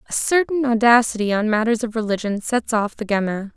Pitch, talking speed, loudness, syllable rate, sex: 225 Hz, 185 wpm, -19 LUFS, 5.7 syllables/s, female